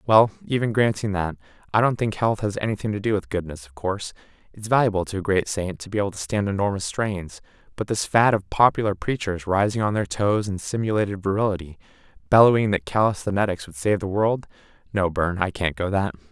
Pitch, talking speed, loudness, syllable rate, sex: 100 Hz, 200 wpm, -23 LUFS, 5.9 syllables/s, male